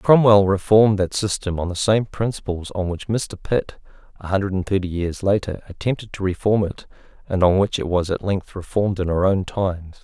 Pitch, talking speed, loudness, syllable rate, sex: 95 Hz, 205 wpm, -21 LUFS, 5.4 syllables/s, male